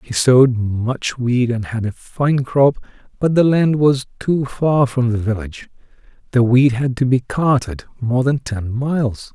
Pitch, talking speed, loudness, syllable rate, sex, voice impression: 125 Hz, 175 wpm, -17 LUFS, 4.2 syllables/s, male, very masculine, very adult-like, very middle-aged, slightly old, very thick, slightly relaxed, very powerful, slightly dark, soft, slightly muffled, fluent, very cool, intellectual, very sincere, very calm, very mature, very friendly, very reassuring, unique, slightly elegant, wild, slightly sweet, slightly lively, very kind, modest